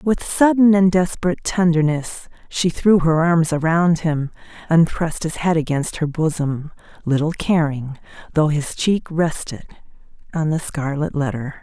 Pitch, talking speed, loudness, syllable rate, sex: 160 Hz, 145 wpm, -19 LUFS, 4.4 syllables/s, female